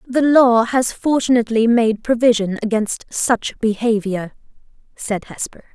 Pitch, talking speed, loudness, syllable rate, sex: 230 Hz, 115 wpm, -17 LUFS, 4.4 syllables/s, female